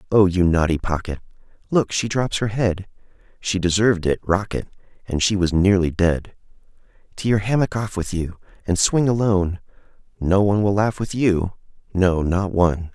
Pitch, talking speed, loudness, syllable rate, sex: 95 Hz, 160 wpm, -20 LUFS, 5.0 syllables/s, male